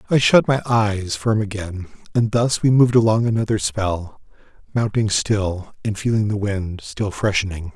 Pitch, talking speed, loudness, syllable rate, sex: 105 Hz, 160 wpm, -20 LUFS, 4.6 syllables/s, male